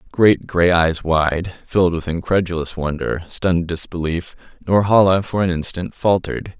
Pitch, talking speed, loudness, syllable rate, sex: 90 Hz, 135 wpm, -18 LUFS, 4.8 syllables/s, male